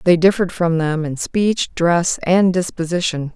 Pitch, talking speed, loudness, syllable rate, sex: 175 Hz, 160 wpm, -17 LUFS, 4.4 syllables/s, female